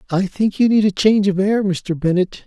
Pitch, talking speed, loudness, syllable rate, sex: 195 Hz, 245 wpm, -17 LUFS, 5.3 syllables/s, male